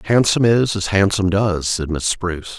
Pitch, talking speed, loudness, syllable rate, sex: 95 Hz, 185 wpm, -18 LUFS, 5.4 syllables/s, male